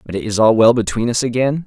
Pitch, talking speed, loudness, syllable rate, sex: 115 Hz, 290 wpm, -15 LUFS, 6.4 syllables/s, male